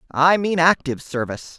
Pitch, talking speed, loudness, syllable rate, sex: 155 Hz, 150 wpm, -19 LUFS, 5.8 syllables/s, male